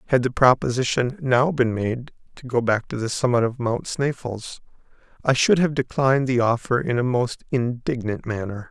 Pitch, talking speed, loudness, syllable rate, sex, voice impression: 125 Hz, 180 wpm, -22 LUFS, 4.9 syllables/s, male, very masculine, middle-aged, slightly thick, muffled, slightly cool, calm, slightly friendly, slightly kind